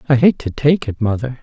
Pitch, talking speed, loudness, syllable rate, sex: 125 Hz, 250 wpm, -16 LUFS, 5.7 syllables/s, male